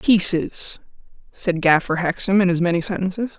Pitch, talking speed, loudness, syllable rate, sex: 185 Hz, 140 wpm, -20 LUFS, 5.0 syllables/s, female